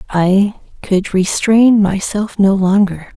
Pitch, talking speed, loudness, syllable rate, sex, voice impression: 200 Hz, 115 wpm, -13 LUFS, 3.3 syllables/s, female, feminine, adult-like, relaxed, slightly weak, slightly dark, intellectual, calm, slightly strict, sharp, slightly modest